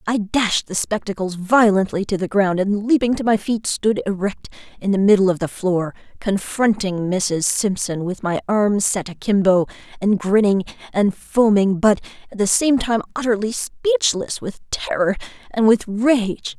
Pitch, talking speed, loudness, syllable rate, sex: 205 Hz, 165 wpm, -19 LUFS, 4.4 syllables/s, female